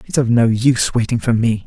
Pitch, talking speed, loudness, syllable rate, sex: 120 Hz, 250 wpm, -16 LUFS, 5.8 syllables/s, male